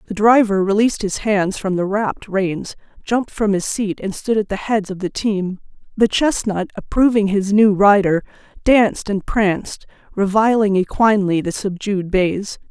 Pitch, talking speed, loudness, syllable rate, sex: 200 Hz, 165 wpm, -17 LUFS, 4.7 syllables/s, female